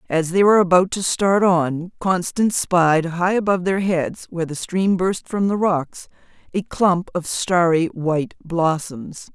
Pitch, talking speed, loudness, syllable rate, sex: 175 Hz, 165 wpm, -19 LUFS, 4.3 syllables/s, female